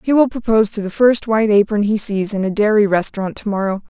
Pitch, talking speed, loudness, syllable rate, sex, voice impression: 210 Hz, 240 wpm, -16 LUFS, 6.4 syllables/s, female, feminine, slightly adult-like, slightly muffled, slightly fluent, slightly calm, slightly sweet